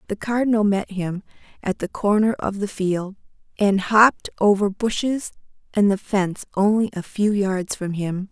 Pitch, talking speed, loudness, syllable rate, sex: 200 Hz, 165 wpm, -21 LUFS, 4.7 syllables/s, female